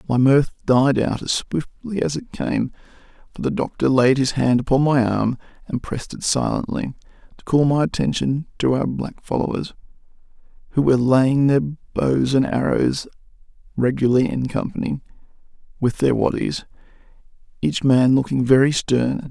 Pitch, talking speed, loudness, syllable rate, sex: 135 Hz, 155 wpm, -20 LUFS, 5.0 syllables/s, male